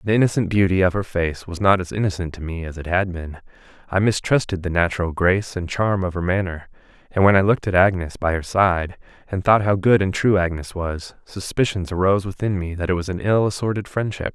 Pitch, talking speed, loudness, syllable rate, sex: 95 Hz, 225 wpm, -20 LUFS, 5.9 syllables/s, male